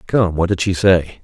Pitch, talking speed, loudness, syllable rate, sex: 90 Hz, 245 wpm, -16 LUFS, 4.7 syllables/s, male